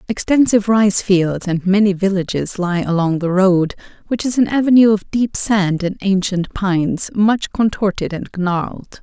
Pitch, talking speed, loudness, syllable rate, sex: 195 Hz, 160 wpm, -16 LUFS, 4.5 syllables/s, female